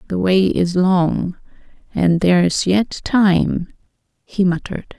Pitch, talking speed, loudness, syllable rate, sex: 185 Hz, 120 wpm, -17 LUFS, 3.5 syllables/s, female